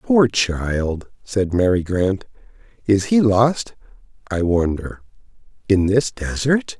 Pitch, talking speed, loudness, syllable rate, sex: 100 Hz, 115 wpm, -19 LUFS, 3.3 syllables/s, male